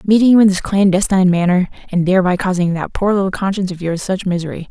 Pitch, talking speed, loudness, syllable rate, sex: 185 Hz, 215 wpm, -15 LUFS, 6.8 syllables/s, female